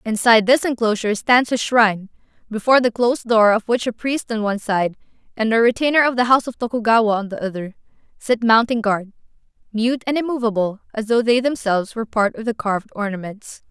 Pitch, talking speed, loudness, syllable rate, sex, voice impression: 225 Hz, 195 wpm, -18 LUFS, 6.1 syllables/s, female, feminine, slightly gender-neutral, slightly young, slightly adult-like, thin, slightly tensed, slightly powerful, bright, hard, clear, slightly fluent, cute, intellectual, slightly refreshing, slightly sincere, friendly, reassuring, unique, elegant, slightly sweet, lively, slightly kind, slightly modest